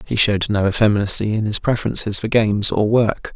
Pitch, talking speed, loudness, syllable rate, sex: 105 Hz, 195 wpm, -17 LUFS, 6.2 syllables/s, male